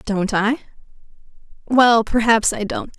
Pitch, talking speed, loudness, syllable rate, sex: 220 Hz, 120 wpm, -17 LUFS, 4.0 syllables/s, female